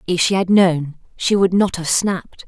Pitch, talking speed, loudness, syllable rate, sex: 180 Hz, 220 wpm, -17 LUFS, 4.7 syllables/s, female